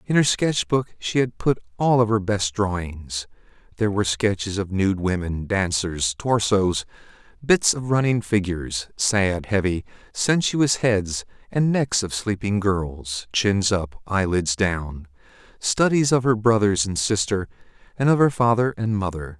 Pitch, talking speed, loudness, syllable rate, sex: 105 Hz, 150 wpm, -22 LUFS, 4.2 syllables/s, male